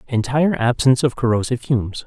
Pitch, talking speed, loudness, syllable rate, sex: 125 Hz, 145 wpm, -18 LUFS, 6.8 syllables/s, male